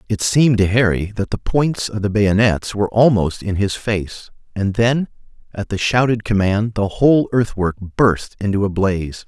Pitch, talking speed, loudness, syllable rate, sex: 105 Hz, 180 wpm, -17 LUFS, 4.7 syllables/s, male